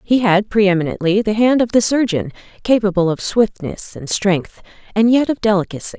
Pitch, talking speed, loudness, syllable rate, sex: 205 Hz, 180 wpm, -16 LUFS, 5.3 syllables/s, female